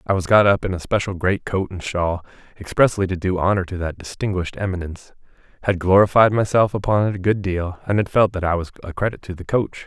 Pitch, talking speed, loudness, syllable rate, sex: 95 Hz, 230 wpm, -20 LUFS, 6.1 syllables/s, male